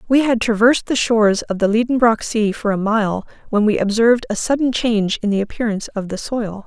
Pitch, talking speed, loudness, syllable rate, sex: 220 Hz, 215 wpm, -17 LUFS, 5.8 syllables/s, female